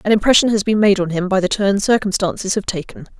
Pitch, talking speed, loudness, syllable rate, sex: 200 Hz, 245 wpm, -16 LUFS, 6.3 syllables/s, female